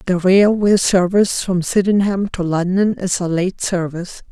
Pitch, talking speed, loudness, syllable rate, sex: 185 Hz, 155 wpm, -16 LUFS, 4.7 syllables/s, female